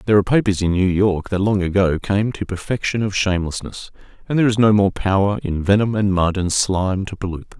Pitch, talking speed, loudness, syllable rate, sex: 100 Hz, 230 wpm, -19 LUFS, 6.2 syllables/s, male